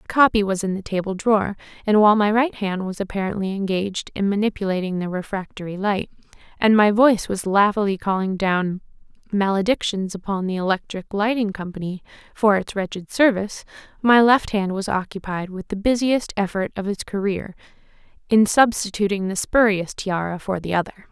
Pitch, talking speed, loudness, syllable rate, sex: 200 Hz, 160 wpm, -21 LUFS, 5.5 syllables/s, female